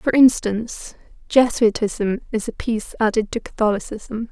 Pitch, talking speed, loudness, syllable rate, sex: 225 Hz, 125 wpm, -20 LUFS, 4.7 syllables/s, female